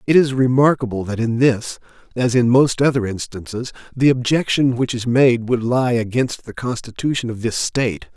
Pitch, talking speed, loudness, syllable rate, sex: 120 Hz, 175 wpm, -18 LUFS, 5.0 syllables/s, male